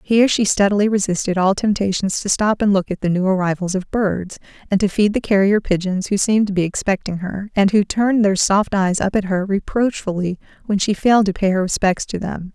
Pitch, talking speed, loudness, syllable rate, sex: 195 Hz, 225 wpm, -18 LUFS, 5.7 syllables/s, female